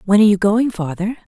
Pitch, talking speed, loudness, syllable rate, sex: 205 Hz, 225 wpm, -17 LUFS, 6.0 syllables/s, female